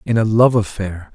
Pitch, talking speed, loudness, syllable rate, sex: 105 Hz, 210 wpm, -16 LUFS, 4.9 syllables/s, male